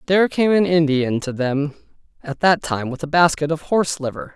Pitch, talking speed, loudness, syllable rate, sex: 155 Hz, 205 wpm, -19 LUFS, 5.4 syllables/s, male